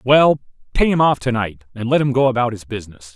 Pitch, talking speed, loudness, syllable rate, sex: 120 Hz, 245 wpm, -18 LUFS, 6.1 syllables/s, male